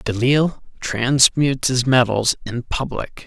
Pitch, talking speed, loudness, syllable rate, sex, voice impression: 125 Hz, 110 wpm, -18 LUFS, 4.0 syllables/s, male, masculine, middle-aged, relaxed, slightly weak, halting, raspy, mature, wild, slightly strict